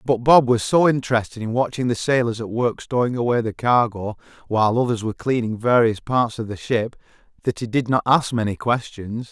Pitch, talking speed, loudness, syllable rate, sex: 120 Hz, 200 wpm, -20 LUFS, 5.5 syllables/s, male